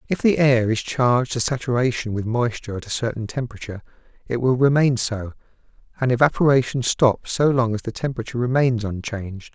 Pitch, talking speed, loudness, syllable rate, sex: 120 Hz, 170 wpm, -21 LUFS, 6.0 syllables/s, male